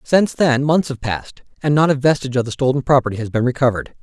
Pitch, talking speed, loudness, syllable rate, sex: 135 Hz, 240 wpm, -18 LUFS, 7.0 syllables/s, male